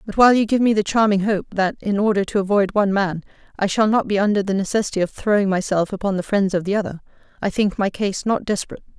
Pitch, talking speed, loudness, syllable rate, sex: 200 Hz, 245 wpm, -19 LUFS, 6.7 syllables/s, female